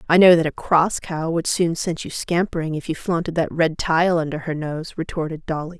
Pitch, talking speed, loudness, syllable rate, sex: 165 Hz, 230 wpm, -21 LUFS, 5.2 syllables/s, female